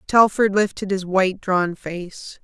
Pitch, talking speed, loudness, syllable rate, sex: 190 Hz, 150 wpm, -20 LUFS, 3.9 syllables/s, female